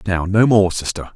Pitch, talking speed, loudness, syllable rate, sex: 100 Hz, 210 wpm, -16 LUFS, 5.0 syllables/s, male